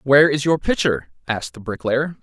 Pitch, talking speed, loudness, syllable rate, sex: 140 Hz, 190 wpm, -20 LUFS, 5.6 syllables/s, male